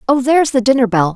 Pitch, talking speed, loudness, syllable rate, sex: 245 Hz, 260 wpm, -13 LUFS, 7.2 syllables/s, female